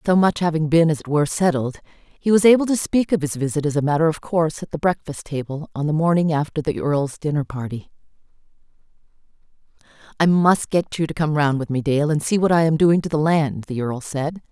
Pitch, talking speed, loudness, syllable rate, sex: 155 Hz, 225 wpm, -20 LUFS, 5.8 syllables/s, female